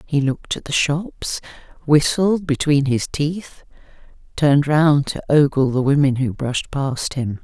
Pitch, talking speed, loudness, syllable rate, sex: 145 Hz, 155 wpm, -19 LUFS, 4.3 syllables/s, female